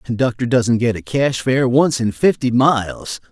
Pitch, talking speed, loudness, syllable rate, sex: 125 Hz, 180 wpm, -17 LUFS, 4.5 syllables/s, male